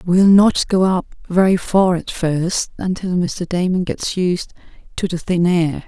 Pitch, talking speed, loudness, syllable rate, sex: 180 Hz, 175 wpm, -17 LUFS, 3.9 syllables/s, female